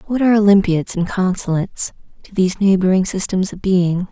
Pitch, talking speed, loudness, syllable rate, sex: 190 Hz, 160 wpm, -17 LUFS, 5.7 syllables/s, female